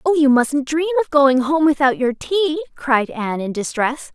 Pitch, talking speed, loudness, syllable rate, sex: 280 Hz, 205 wpm, -18 LUFS, 5.0 syllables/s, female